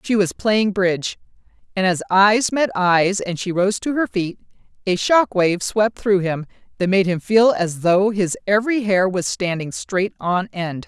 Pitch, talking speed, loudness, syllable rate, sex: 195 Hz, 195 wpm, -19 LUFS, 4.3 syllables/s, female